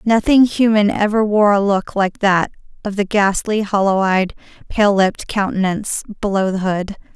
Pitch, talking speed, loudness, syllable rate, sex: 200 Hz, 160 wpm, -16 LUFS, 4.8 syllables/s, female